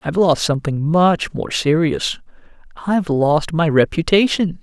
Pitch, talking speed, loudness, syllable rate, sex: 165 Hz, 130 wpm, -17 LUFS, 4.7 syllables/s, male